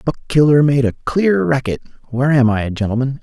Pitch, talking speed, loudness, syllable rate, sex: 130 Hz, 185 wpm, -16 LUFS, 5.7 syllables/s, male